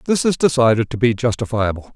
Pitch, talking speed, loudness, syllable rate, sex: 120 Hz, 185 wpm, -17 LUFS, 6.1 syllables/s, male